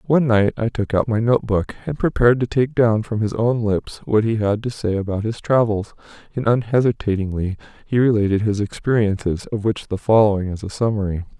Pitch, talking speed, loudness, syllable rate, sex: 110 Hz, 200 wpm, -20 LUFS, 5.7 syllables/s, male